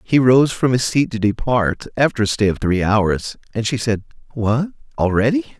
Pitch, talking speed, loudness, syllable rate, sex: 115 Hz, 195 wpm, -18 LUFS, 4.8 syllables/s, male